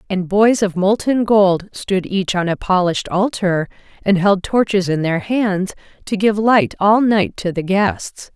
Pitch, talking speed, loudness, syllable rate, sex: 195 Hz, 180 wpm, -16 LUFS, 4.0 syllables/s, female